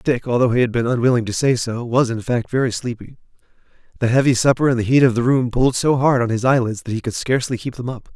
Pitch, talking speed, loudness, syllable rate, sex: 125 Hz, 265 wpm, -18 LUFS, 6.6 syllables/s, male